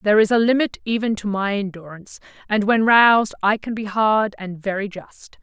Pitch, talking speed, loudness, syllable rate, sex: 210 Hz, 200 wpm, -19 LUFS, 5.3 syllables/s, female